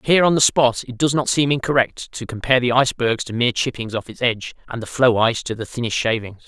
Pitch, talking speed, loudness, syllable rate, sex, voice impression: 125 Hz, 250 wpm, -19 LUFS, 6.5 syllables/s, male, masculine, adult-like, slightly refreshing, slightly sincere, slightly unique